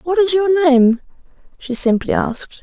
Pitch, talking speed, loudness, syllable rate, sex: 305 Hz, 160 wpm, -15 LUFS, 4.6 syllables/s, female